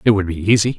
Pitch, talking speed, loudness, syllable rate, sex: 100 Hz, 305 wpm, -17 LUFS, 7.3 syllables/s, male